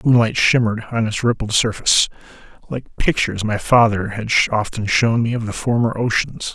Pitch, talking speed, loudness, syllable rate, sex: 115 Hz, 175 wpm, -18 LUFS, 5.5 syllables/s, male